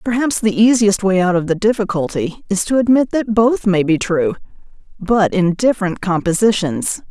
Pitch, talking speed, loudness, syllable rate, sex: 200 Hz, 160 wpm, -16 LUFS, 4.9 syllables/s, female